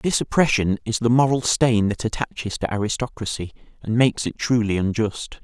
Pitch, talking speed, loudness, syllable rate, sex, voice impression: 115 Hz, 165 wpm, -21 LUFS, 5.4 syllables/s, male, masculine, adult-like, tensed, powerful, hard, clear, fluent, intellectual, friendly, unique, wild, lively